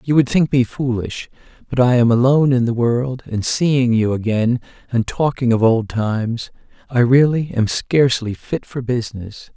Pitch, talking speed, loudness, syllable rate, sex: 125 Hz, 170 wpm, -17 LUFS, 4.7 syllables/s, male